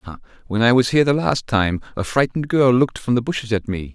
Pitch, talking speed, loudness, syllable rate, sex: 120 Hz, 260 wpm, -19 LUFS, 6.6 syllables/s, male